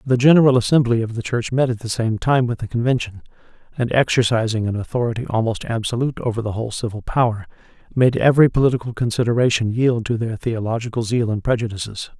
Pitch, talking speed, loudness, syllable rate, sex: 115 Hz, 175 wpm, -19 LUFS, 6.4 syllables/s, male